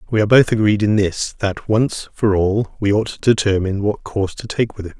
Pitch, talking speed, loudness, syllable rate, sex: 105 Hz, 240 wpm, -18 LUFS, 5.7 syllables/s, male